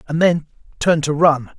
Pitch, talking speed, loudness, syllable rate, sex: 155 Hz, 190 wpm, -17 LUFS, 5.4 syllables/s, male